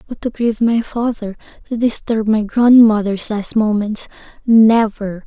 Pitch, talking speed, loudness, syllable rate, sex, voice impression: 220 Hz, 115 wpm, -15 LUFS, 4.3 syllables/s, female, very feminine, young, very thin, very relaxed, very weak, very dark, very soft, muffled, halting, slightly raspy, very cute, intellectual, slightly refreshing, very sincere, very calm, very friendly, very reassuring, very unique, very elegant, slightly wild, very sweet, slightly lively, very kind, very modest